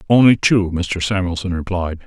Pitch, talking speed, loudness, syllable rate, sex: 95 Hz, 145 wpm, -17 LUFS, 5.0 syllables/s, male